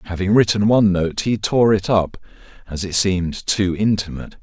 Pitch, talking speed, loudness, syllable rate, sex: 95 Hz, 175 wpm, -18 LUFS, 5.3 syllables/s, male